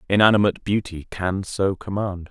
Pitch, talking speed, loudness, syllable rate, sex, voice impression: 95 Hz, 130 wpm, -22 LUFS, 5.2 syllables/s, male, masculine, adult-like, tensed, slightly powerful, clear, fluent, cool, calm, reassuring, wild, slightly strict